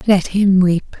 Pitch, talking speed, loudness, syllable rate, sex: 190 Hz, 180 wpm, -15 LUFS, 3.5 syllables/s, male